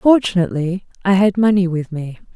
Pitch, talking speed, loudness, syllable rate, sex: 185 Hz, 155 wpm, -17 LUFS, 5.5 syllables/s, female